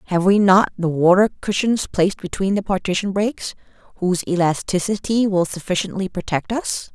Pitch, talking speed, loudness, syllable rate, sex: 190 Hz, 145 wpm, -19 LUFS, 5.3 syllables/s, female